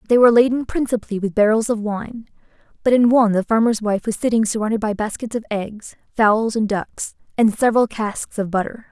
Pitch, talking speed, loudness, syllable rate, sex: 220 Hz, 195 wpm, -19 LUFS, 5.7 syllables/s, female